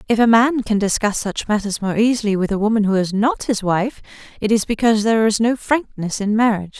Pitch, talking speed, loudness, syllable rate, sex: 215 Hz, 230 wpm, -18 LUFS, 6.0 syllables/s, female